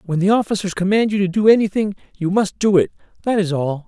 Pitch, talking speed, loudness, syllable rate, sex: 195 Hz, 230 wpm, -18 LUFS, 6.2 syllables/s, male